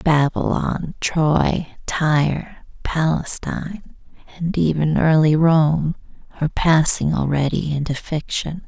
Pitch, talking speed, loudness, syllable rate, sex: 155 Hz, 90 wpm, -19 LUFS, 3.7 syllables/s, female